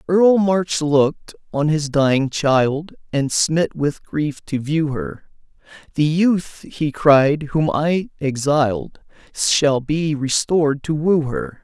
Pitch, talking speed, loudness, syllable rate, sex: 150 Hz, 140 wpm, -18 LUFS, 3.3 syllables/s, male